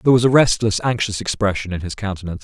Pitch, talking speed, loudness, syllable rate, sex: 105 Hz, 220 wpm, -18 LUFS, 7.4 syllables/s, male